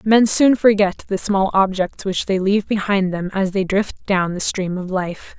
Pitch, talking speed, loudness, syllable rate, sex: 195 Hz, 210 wpm, -18 LUFS, 4.4 syllables/s, female